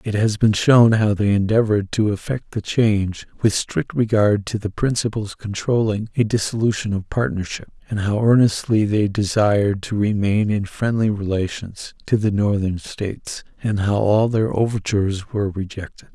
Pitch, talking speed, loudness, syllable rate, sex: 105 Hz, 160 wpm, -20 LUFS, 4.8 syllables/s, male